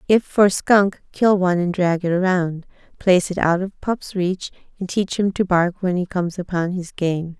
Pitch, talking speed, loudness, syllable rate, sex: 185 Hz, 210 wpm, -20 LUFS, 4.8 syllables/s, female